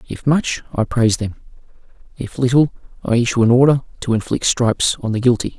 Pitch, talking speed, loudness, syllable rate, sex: 120 Hz, 185 wpm, -17 LUFS, 6.0 syllables/s, male